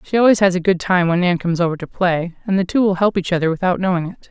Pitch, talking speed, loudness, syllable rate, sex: 180 Hz, 305 wpm, -17 LUFS, 6.9 syllables/s, female